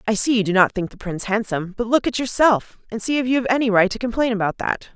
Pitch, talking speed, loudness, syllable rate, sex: 220 Hz, 290 wpm, -20 LUFS, 6.7 syllables/s, female